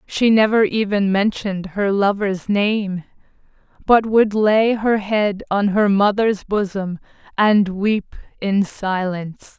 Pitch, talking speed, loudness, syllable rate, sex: 205 Hz, 125 wpm, -18 LUFS, 3.6 syllables/s, female